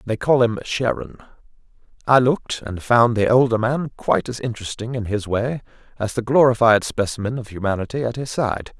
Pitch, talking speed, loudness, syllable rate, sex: 115 Hz, 175 wpm, -20 LUFS, 5.5 syllables/s, male